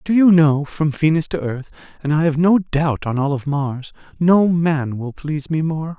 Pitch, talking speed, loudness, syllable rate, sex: 155 Hz, 220 wpm, -18 LUFS, 4.5 syllables/s, male